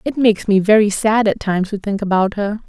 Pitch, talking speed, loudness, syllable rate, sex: 205 Hz, 245 wpm, -16 LUFS, 6.0 syllables/s, female